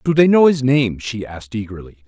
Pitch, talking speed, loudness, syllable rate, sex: 120 Hz, 230 wpm, -16 LUFS, 5.9 syllables/s, male